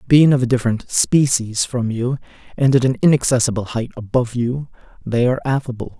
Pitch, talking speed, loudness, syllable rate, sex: 125 Hz, 170 wpm, -18 LUFS, 5.9 syllables/s, male